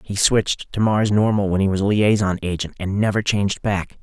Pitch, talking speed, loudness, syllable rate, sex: 100 Hz, 225 wpm, -19 LUFS, 5.5 syllables/s, male